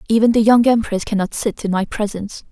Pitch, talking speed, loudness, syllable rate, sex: 215 Hz, 215 wpm, -17 LUFS, 6.1 syllables/s, female